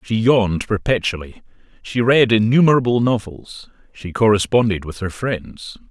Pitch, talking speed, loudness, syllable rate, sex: 110 Hz, 120 wpm, -17 LUFS, 4.7 syllables/s, male